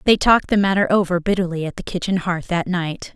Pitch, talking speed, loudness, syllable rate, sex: 180 Hz, 230 wpm, -19 LUFS, 6.0 syllables/s, female